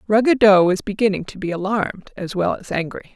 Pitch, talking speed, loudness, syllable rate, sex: 195 Hz, 190 wpm, -19 LUFS, 5.8 syllables/s, female